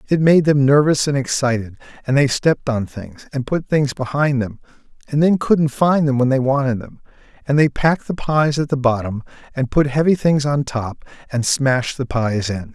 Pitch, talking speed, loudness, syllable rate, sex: 135 Hz, 205 wpm, -18 LUFS, 5.1 syllables/s, male